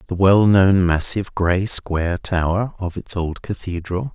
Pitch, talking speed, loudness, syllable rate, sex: 95 Hz, 145 wpm, -19 LUFS, 4.4 syllables/s, male